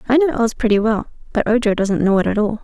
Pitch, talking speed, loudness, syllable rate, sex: 225 Hz, 275 wpm, -17 LUFS, 6.4 syllables/s, female